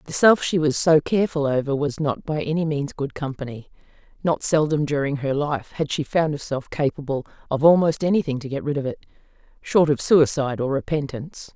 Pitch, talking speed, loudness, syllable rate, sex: 145 Hz, 190 wpm, -22 LUFS, 5.5 syllables/s, female